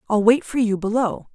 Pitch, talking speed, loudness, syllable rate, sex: 220 Hz, 225 wpm, -20 LUFS, 5.2 syllables/s, female